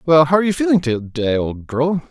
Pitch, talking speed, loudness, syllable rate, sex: 140 Hz, 255 wpm, -17 LUFS, 5.5 syllables/s, male